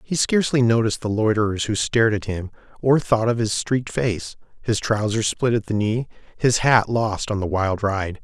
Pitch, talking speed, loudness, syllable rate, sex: 110 Hz, 205 wpm, -21 LUFS, 5.1 syllables/s, male